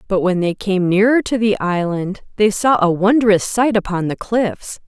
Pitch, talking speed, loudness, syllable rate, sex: 200 Hz, 195 wpm, -16 LUFS, 4.4 syllables/s, female